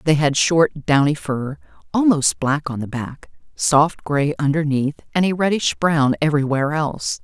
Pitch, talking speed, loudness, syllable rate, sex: 145 Hz, 160 wpm, -19 LUFS, 4.7 syllables/s, female